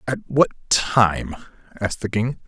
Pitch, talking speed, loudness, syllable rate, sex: 110 Hz, 145 wpm, -21 LUFS, 4.6 syllables/s, male